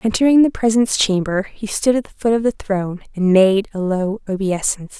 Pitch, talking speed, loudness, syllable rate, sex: 205 Hz, 205 wpm, -17 LUFS, 5.6 syllables/s, female